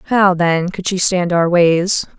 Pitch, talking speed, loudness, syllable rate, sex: 180 Hz, 190 wpm, -15 LUFS, 3.7 syllables/s, female